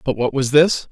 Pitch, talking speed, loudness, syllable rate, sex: 140 Hz, 265 wpm, -16 LUFS, 4.9 syllables/s, male